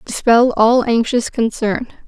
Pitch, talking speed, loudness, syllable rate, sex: 235 Hz, 115 wpm, -15 LUFS, 3.9 syllables/s, female